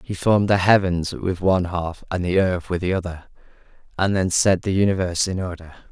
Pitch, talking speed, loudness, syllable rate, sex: 90 Hz, 205 wpm, -21 LUFS, 5.7 syllables/s, male